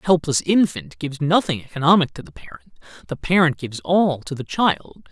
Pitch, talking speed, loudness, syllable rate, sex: 155 Hz, 190 wpm, -20 LUFS, 5.5 syllables/s, male